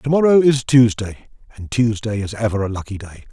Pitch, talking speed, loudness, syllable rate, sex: 115 Hz, 200 wpm, -17 LUFS, 6.0 syllables/s, male